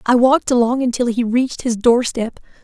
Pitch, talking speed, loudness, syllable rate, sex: 240 Hz, 205 wpm, -17 LUFS, 5.6 syllables/s, female